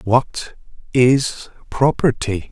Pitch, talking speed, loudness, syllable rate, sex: 125 Hz, 70 wpm, -17 LUFS, 2.7 syllables/s, male